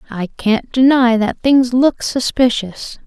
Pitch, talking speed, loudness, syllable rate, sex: 240 Hz, 135 wpm, -14 LUFS, 3.6 syllables/s, female